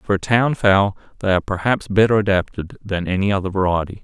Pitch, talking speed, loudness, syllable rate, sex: 100 Hz, 195 wpm, -18 LUFS, 5.9 syllables/s, male